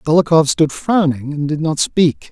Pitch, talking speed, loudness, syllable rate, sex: 155 Hz, 180 wpm, -15 LUFS, 4.4 syllables/s, male